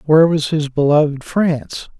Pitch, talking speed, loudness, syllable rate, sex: 150 Hz, 150 wpm, -16 LUFS, 5.1 syllables/s, male